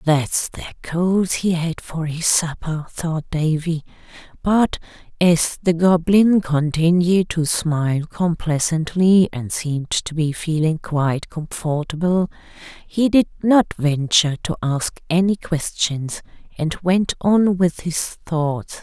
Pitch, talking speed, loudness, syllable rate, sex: 165 Hz, 125 wpm, -19 LUFS, 3.6 syllables/s, female